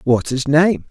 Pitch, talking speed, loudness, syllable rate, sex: 145 Hz, 200 wpm, -16 LUFS, 3.8 syllables/s, male